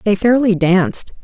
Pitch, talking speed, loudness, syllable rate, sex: 200 Hz, 145 wpm, -14 LUFS, 4.8 syllables/s, female